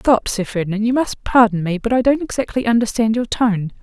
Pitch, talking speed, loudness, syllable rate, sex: 225 Hz, 220 wpm, -17 LUFS, 5.7 syllables/s, female